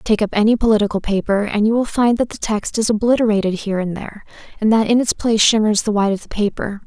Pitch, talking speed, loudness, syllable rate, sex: 215 Hz, 245 wpm, -17 LUFS, 6.6 syllables/s, female